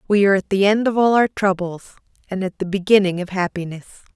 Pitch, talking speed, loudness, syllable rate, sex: 195 Hz, 215 wpm, -18 LUFS, 6.3 syllables/s, female